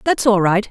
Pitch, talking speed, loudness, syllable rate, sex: 210 Hz, 255 wpm, -15 LUFS, 5.1 syllables/s, female